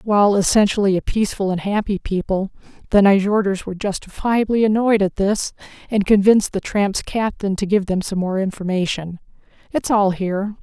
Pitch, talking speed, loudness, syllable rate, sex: 200 Hz, 160 wpm, -19 LUFS, 5.4 syllables/s, female